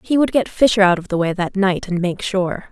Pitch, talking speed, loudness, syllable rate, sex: 195 Hz, 285 wpm, -18 LUFS, 5.5 syllables/s, female